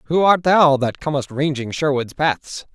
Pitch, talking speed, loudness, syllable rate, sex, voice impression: 145 Hz, 175 wpm, -18 LUFS, 4.4 syllables/s, male, very masculine, very middle-aged, thick, very tensed, very powerful, very bright, soft, very clear, very fluent, slightly raspy, very cool, intellectual, very refreshing, sincere, slightly calm, mature, friendly, reassuring, very unique, slightly elegant, very wild, slightly sweet, very lively, kind, intense